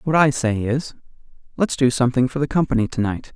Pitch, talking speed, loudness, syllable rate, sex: 130 Hz, 195 wpm, -20 LUFS, 6.0 syllables/s, male